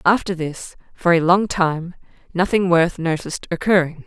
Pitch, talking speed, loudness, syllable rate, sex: 175 Hz, 150 wpm, -19 LUFS, 4.9 syllables/s, female